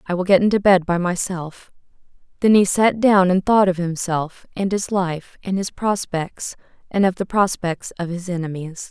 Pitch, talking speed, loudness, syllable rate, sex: 185 Hz, 180 wpm, -19 LUFS, 4.7 syllables/s, female